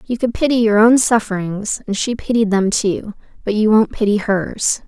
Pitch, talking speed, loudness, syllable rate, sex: 215 Hz, 195 wpm, -16 LUFS, 4.8 syllables/s, female